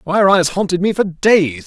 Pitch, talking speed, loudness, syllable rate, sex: 180 Hz, 255 wpm, -14 LUFS, 5.1 syllables/s, male